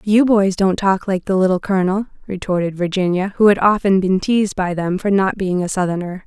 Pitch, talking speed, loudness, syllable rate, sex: 190 Hz, 210 wpm, -17 LUFS, 5.6 syllables/s, female